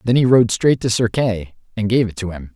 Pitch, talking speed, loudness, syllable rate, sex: 110 Hz, 280 wpm, -17 LUFS, 5.3 syllables/s, male